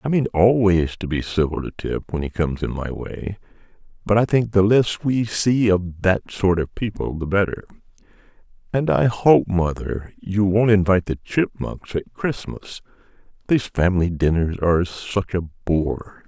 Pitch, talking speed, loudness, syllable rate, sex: 95 Hz, 165 wpm, -21 LUFS, 4.5 syllables/s, male